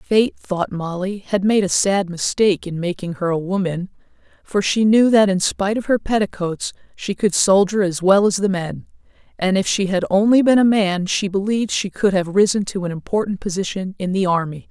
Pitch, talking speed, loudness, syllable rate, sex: 195 Hz, 205 wpm, -18 LUFS, 5.2 syllables/s, female